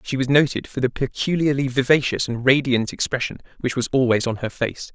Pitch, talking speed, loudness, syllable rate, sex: 130 Hz, 195 wpm, -21 LUFS, 5.7 syllables/s, male